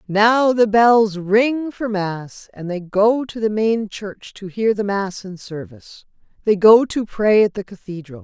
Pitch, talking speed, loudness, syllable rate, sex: 205 Hz, 190 wpm, -17 LUFS, 3.9 syllables/s, female